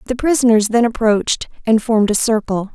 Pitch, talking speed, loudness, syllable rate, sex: 225 Hz, 175 wpm, -16 LUFS, 5.8 syllables/s, female